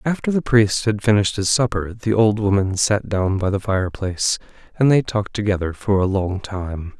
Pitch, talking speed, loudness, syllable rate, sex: 105 Hz, 205 wpm, -19 LUFS, 5.1 syllables/s, male